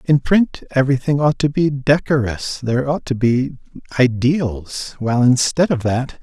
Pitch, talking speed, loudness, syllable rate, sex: 135 Hz, 155 wpm, -17 LUFS, 4.5 syllables/s, male